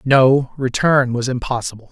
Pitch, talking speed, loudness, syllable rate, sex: 130 Hz, 125 wpm, -17 LUFS, 4.5 syllables/s, male